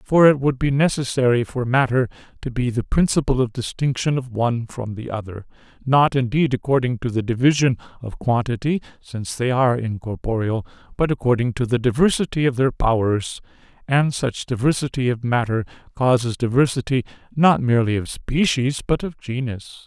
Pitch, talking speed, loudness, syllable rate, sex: 125 Hz, 155 wpm, -20 LUFS, 5.4 syllables/s, male